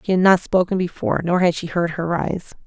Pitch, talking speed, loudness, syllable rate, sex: 175 Hz, 250 wpm, -20 LUFS, 5.9 syllables/s, female